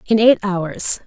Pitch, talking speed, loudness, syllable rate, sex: 200 Hz, 170 wpm, -16 LUFS, 3.5 syllables/s, female